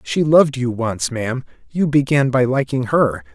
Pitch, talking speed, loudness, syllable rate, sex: 130 Hz, 180 wpm, -17 LUFS, 4.8 syllables/s, male